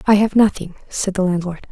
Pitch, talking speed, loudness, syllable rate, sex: 195 Hz, 210 wpm, -18 LUFS, 5.6 syllables/s, female